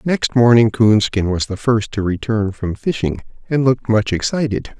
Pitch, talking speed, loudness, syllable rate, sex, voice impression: 110 Hz, 175 wpm, -17 LUFS, 4.7 syllables/s, male, masculine, slightly middle-aged, slightly thick, slightly muffled, slightly calm, elegant, kind